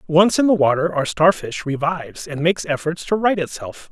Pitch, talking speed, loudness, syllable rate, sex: 165 Hz, 200 wpm, -19 LUFS, 5.3 syllables/s, male